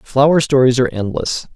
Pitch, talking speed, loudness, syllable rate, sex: 130 Hz, 155 wpm, -15 LUFS, 5.4 syllables/s, male